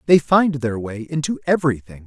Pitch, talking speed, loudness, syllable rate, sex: 140 Hz, 175 wpm, -19 LUFS, 5.4 syllables/s, male